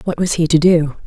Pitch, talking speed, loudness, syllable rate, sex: 165 Hz, 280 wpm, -15 LUFS, 5.7 syllables/s, female